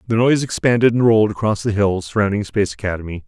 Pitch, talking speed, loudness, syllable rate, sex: 105 Hz, 200 wpm, -17 LUFS, 7.0 syllables/s, male